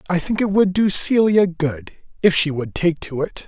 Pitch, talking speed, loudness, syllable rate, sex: 175 Hz, 205 wpm, -18 LUFS, 4.8 syllables/s, male